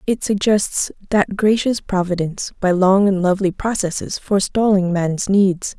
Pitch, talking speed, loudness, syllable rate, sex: 195 Hz, 135 wpm, -18 LUFS, 4.6 syllables/s, female